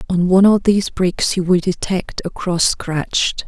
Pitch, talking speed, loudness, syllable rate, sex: 185 Hz, 190 wpm, -16 LUFS, 4.6 syllables/s, female